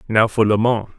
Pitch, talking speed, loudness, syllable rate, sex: 110 Hz, 245 wpm, -17 LUFS, 5.3 syllables/s, male